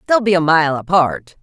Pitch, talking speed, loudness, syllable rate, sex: 165 Hz, 210 wpm, -15 LUFS, 5.0 syllables/s, female